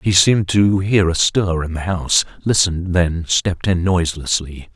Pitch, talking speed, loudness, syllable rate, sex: 90 Hz, 150 wpm, -17 LUFS, 4.9 syllables/s, male